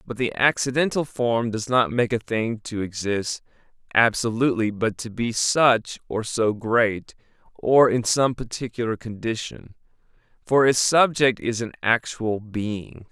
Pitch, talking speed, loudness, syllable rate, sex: 115 Hz, 140 wpm, -22 LUFS, 4.1 syllables/s, male